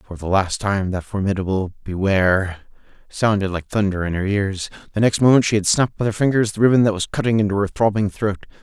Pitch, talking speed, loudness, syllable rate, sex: 100 Hz, 215 wpm, -19 LUFS, 6.0 syllables/s, male